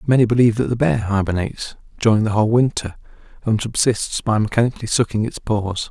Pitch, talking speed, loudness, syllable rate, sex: 110 Hz, 175 wpm, -19 LUFS, 6.3 syllables/s, male